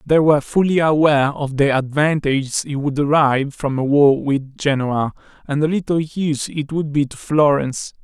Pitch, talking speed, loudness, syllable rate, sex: 145 Hz, 180 wpm, -18 LUFS, 5.1 syllables/s, male